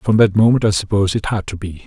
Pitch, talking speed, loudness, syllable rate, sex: 100 Hz, 290 wpm, -16 LUFS, 6.6 syllables/s, male